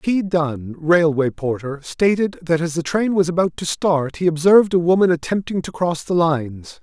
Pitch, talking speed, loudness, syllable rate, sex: 165 Hz, 195 wpm, -19 LUFS, 5.0 syllables/s, male